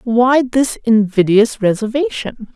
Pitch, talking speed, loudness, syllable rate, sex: 230 Hz, 95 wpm, -14 LUFS, 3.8 syllables/s, female